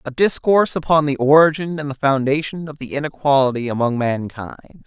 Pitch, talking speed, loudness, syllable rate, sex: 145 Hz, 160 wpm, -18 LUFS, 5.8 syllables/s, male